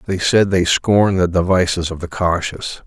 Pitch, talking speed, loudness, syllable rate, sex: 90 Hz, 190 wpm, -16 LUFS, 4.9 syllables/s, male